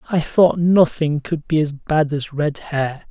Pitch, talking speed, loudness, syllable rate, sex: 155 Hz, 195 wpm, -18 LUFS, 3.9 syllables/s, male